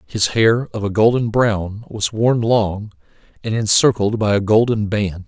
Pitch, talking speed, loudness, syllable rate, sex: 110 Hz, 170 wpm, -17 LUFS, 4.1 syllables/s, male